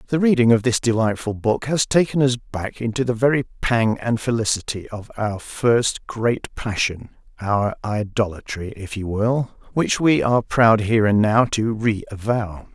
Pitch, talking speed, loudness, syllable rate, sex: 115 Hz, 160 wpm, -20 LUFS, 4.5 syllables/s, male